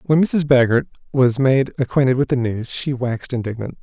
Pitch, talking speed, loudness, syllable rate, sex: 130 Hz, 190 wpm, -18 LUFS, 5.3 syllables/s, male